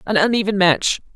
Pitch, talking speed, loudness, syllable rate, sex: 200 Hz, 155 wpm, -17 LUFS, 5.4 syllables/s, female